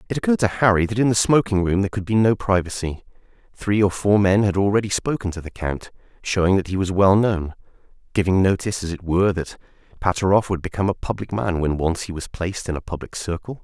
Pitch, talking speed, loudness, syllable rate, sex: 95 Hz, 225 wpm, -21 LUFS, 6.4 syllables/s, male